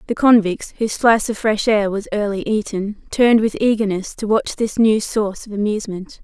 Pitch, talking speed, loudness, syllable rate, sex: 215 Hz, 175 wpm, -18 LUFS, 5.5 syllables/s, female